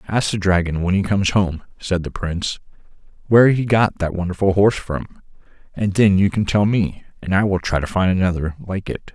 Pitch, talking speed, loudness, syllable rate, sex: 95 Hz, 210 wpm, -19 LUFS, 5.6 syllables/s, male